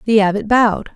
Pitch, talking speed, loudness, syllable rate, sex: 215 Hz, 190 wpm, -15 LUFS, 6.2 syllables/s, female